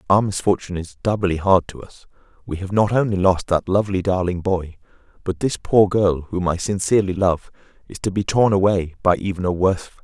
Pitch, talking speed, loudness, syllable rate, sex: 95 Hz, 205 wpm, -20 LUFS, 5.7 syllables/s, male